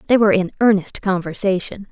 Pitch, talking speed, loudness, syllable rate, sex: 195 Hz, 155 wpm, -18 LUFS, 6.1 syllables/s, female